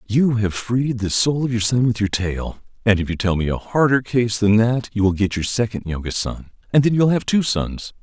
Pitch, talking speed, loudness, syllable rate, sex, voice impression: 115 Hz, 260 wpm, -19 LUFS, 5.2 syllables/s, male, masculine, middle-aged, thick, slightly powerful, slightly hard, clear, fluent, cool, sincere, calm, slightly mature, elegant, wild, lively, slightly strict